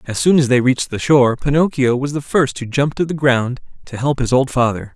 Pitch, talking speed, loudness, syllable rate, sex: 130 Hz, 255 wpm, -16 LUFS, 5.7 syllables/s, male